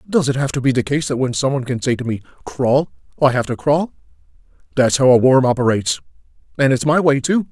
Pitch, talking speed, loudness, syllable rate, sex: 130 Hz, 225 wpm, -17 LUFS, 6.3 syllables/s, male